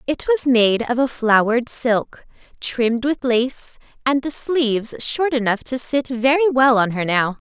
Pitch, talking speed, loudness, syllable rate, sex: 250 Hz, 175 wpm, -19 LUFS, 4.3 syllables/s, female